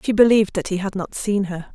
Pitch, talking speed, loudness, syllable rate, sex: 200 Hz, 275 wpm, -20 LUFS, 6.3 syllables/s, female